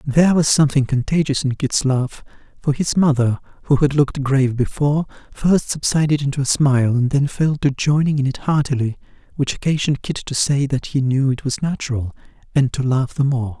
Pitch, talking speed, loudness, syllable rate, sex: 140 Hz, 195 wpm, -18 LUFS, 5.6 syllables/s, male